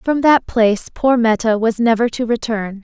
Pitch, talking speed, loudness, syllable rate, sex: 230 Hz, 190 wpm, -16 LUFS, 4.8 syllables/s, female